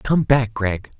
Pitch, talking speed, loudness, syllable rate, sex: 115 Hz, 180 wpm, -19 LUFS, 3.3 syllables/s, male